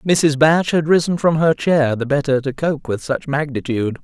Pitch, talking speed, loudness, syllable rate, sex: 150 Hz, 210 wpm, -17 LUFS, 4.8 syllables/s, male